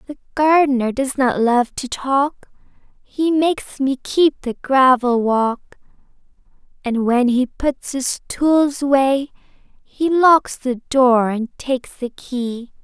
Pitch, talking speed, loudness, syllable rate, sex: 265 Hz, 135 wpm, -18 LUFS, 3.3 syllables/s, female